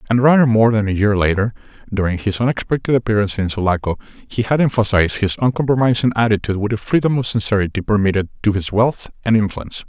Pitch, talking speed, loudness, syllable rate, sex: 110 Hz, 180 wpm, -17 LUFS, 6.7 syllables/s, male